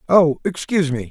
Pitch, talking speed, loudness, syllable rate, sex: 155 Hz, 160 wpm, -19 LUFS, 5.6 syllables/s, male